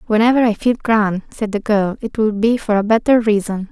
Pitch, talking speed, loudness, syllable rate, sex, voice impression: 215 Hz, 225 wpm, -16 LUFS, 5.3 syllables/s, female, very feminine, slightly young, adult-like, slightly thin, slightly relaxed, weak, slightly dark, soft, slightly muffled, slightly halting, cute, intellectual, slightly refreshing, very sincere, very calm, friendly, reassuring, unique, very elegant, sweet, very kind, modest, slightly light